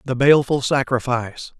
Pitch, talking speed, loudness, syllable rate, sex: 130 Hz, 115 wpm, -18 LUFS, 5.7 syllables/s, male